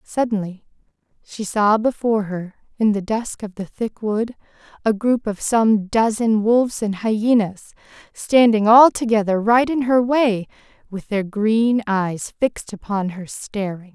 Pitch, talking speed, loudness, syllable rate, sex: 215 Hz, 150 wpm, -19 LUFS, 4.1 syllables/s, female